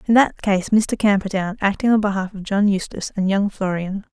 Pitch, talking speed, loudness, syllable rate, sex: 200 Hz, 200 wpm, -20 LUFS, 5.4 syllables/s, female